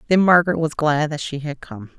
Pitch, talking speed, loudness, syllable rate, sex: 160 Hz, 240 wpm, -19 LUFS, 5.8 syllables/s, female